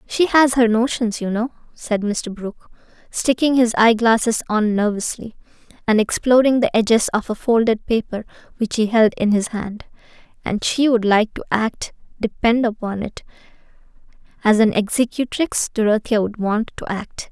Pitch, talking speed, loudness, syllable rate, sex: 225 Hz, 155 wpm, -18 LUFS, 4.8 syllables/s, female